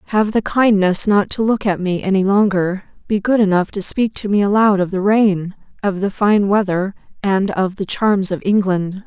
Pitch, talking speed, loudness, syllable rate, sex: 200 Hz, 205 wpm, -16 LUFS, 4.7 syllables/s, female